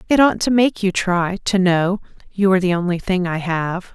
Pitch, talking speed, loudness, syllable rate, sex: 185 Hz, 230 wpm, -18 LUFS, 5.0 syllables/s, female